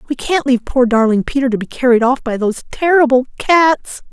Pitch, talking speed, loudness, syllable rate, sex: 260 Hz, 205 wpm, -14 LUFS, 5.8 syllables/s, female